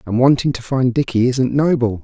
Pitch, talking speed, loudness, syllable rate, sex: 125 Hz, 205 wpm, -16 LUFS, 5.2 syllables/s, male